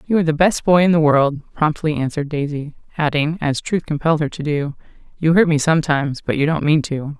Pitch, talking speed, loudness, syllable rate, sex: 155 Hz, 225 wpm, -18 LUFS, 6.0 syllables/s, female